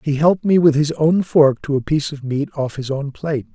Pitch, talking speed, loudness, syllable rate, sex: 150 Hz, 270 wpm, -18 LUFS, 5.6 syllables/s, male